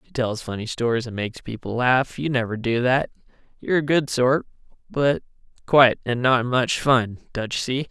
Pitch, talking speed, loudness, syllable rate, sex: 125 Hz, 180 wpm, -22 LUFS, 5.0 syllables/s, male